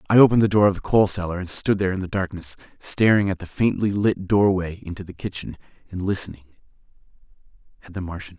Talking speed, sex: 215 wpm, male